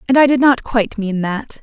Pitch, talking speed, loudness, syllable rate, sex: 235 Hz, 260 wpm, -15 LUFS, 5.4 syllables/s, female